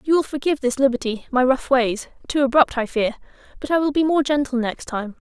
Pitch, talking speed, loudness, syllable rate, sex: 265 Hz, 205 wpm, -20 LUFS, 6.1 syllables/s, female